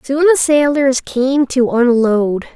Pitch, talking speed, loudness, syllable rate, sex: 260 Hz, 140 wpm, -13 LUFS, 3.5 syllables/s, female